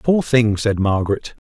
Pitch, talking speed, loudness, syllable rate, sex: 115 Hz, 160 wpm, -18 LUFS, 4.7 syllables/s, male